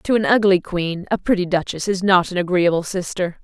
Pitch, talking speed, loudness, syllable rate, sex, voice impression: 185 Hz, 210 wpm, -19 LUFS, 5.4 syllables/s, female, very feminine, adult-like, thin, tensed, very powerful, bright, very hard, very clear, very fluent, cool, intellectual, very refreshing, sincere, slightly calm, slightly friendly, reassuring, slightly unique, slightly elegant, slightly wild, slightly sweet, lively, strict, slightly intense